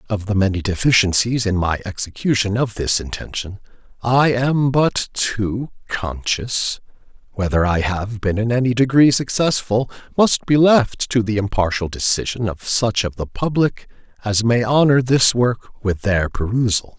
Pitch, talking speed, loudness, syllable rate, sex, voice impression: 115 Hz, 150 wpm, -18 LUFS, 4.4 syllables/s, male, very masculine, slightly old, mature, slightly elegant, sweet